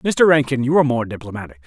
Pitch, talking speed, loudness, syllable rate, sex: 130 Hz, 215 wpm, -17 LUFS, 6.9 syllables/s, male